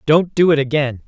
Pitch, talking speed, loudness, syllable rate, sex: 150 Hz, 225 wpm, -16 LUFS, 5.3 syllables/s, female